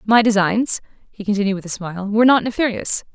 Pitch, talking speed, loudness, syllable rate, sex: 210 Hz, 190 wpm, -18 LUFS, 6.3 syllables/s, female